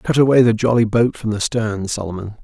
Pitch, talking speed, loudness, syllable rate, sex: 110 Hz, 220 wpm, -17 LUFS, 5.5 syllables/s, male